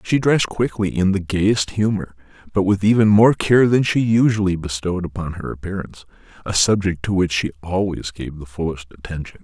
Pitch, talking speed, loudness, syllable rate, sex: 95 Hz, 185 wpm, -19 LUFS, 5.5 syllables/s, male